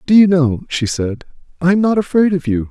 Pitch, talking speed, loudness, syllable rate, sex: 160 Hz, 245 wpm, -15 LUFS, 5.5 syllables/s, male